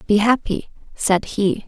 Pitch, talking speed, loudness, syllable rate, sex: 210 Hz, 145 wpm, -20 LUFS, 3.9 syllables/s, female